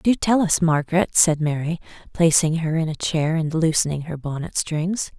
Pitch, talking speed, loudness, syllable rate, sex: 160 Hz, 185 wpm, -21 LUFS, 4.8 syllables/s, female